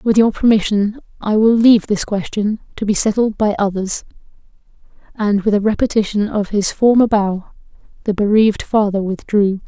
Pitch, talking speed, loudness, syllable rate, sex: 210 Hz, 155 wpm, -16 LUFS, 5.1 syllables/s, female